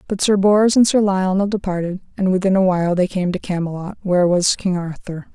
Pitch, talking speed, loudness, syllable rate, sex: 190 Hz, 215 wpm, -18 LUFS, 5.7 syllables/s, female